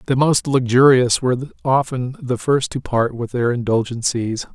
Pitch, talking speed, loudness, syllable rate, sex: 125 Hz, 160 wpm, -18 LUFS, 4.7 syllables/s, male